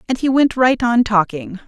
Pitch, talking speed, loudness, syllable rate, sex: 230 Hz, 215 wpm, -16 LUFS, 4.8 syllables/s, female